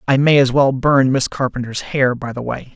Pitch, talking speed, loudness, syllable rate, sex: 130 Hz, 240 wpm, -16 LUFS, 5.0 syllables/s, male